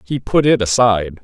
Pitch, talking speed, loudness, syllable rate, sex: 110 Hz, 195 wpm, -15 LUFS, 5.3 syllables/s, male